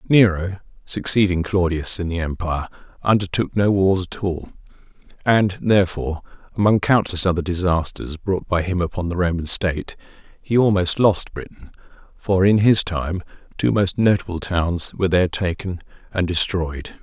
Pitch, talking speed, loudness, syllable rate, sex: 90 Hz, 145 wpm, -20 LUFS, 5.0 syllables/s, male